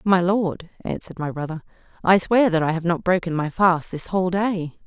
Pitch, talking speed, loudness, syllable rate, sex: 175 Hz, 210 wpm, -21 LUFS, 5.3 syllables/s, female